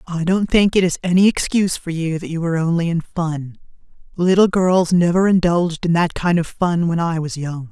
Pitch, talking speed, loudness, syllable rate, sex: 175 Hz, 220 wpm, -18 LUFS, 5.3 syllables/s, female